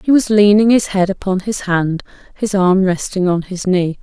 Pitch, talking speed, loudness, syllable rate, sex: 190 Hz, 210 wpm, -15 LUFS, 4.7 syllables/s, female